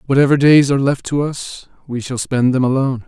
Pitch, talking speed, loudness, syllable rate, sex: 130 Hz, 215 wpm, -15 LUFS, 5.9 syllables/s, male